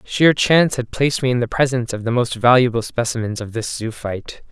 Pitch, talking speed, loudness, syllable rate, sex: 120 Hz, 215 wpm, -18 LUFS, 6.0 syllables/s, male